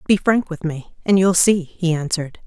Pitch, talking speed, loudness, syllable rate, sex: 175 Hz, 220 wpm, -19 LUFS, 5.0 syllables/s, female